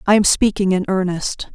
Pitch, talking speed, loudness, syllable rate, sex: 195 Hz, 195 wpm, -17 LUFS, 5.1 syllables/s, female